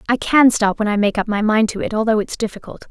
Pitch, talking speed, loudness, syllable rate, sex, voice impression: 220 Hz, 290 wpm, -17 LUFS, 6.3 syllables/s, female, feminine, slightly young, tensed, powerful, clear, fluent, intellectual, calm, lively, sharp